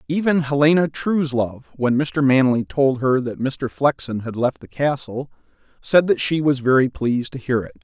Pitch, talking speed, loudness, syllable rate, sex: 135 Hz, 185 wpm, -20 LUFS, 4.9 syllables/s, male